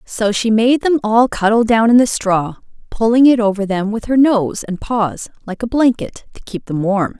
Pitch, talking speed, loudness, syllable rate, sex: 220 Hz, 215 wpm, -15 LUFS, 4.6 syllables/s, female